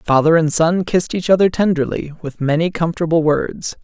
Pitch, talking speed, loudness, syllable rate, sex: 165 Hz, 170 wpm, -16 LUFS, 5.4 syllables/s, male